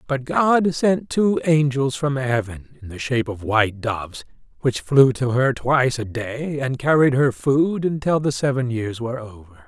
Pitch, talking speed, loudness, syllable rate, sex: 135 Hz, 185 wpm, -20 LUFS, 4.7 syllables/s, male